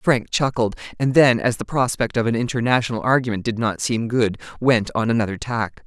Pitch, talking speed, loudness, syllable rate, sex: 115 Hz, 195 wpm, -20 LUFS, 5.5 syllables/s, female